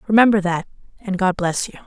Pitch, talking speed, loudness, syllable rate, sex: 195 Hz, 195 wpm, -19 LUFS, 6.0 syllables/s, female